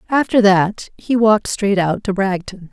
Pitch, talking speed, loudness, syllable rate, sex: 200 Hz, 175 wpm, -16 LUFS, 4.5 syllables/s, female